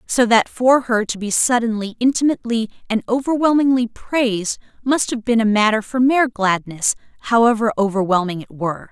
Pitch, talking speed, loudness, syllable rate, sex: 230 Hz, 155 wpm, -18 LUFS, 5.5 syllables/s, female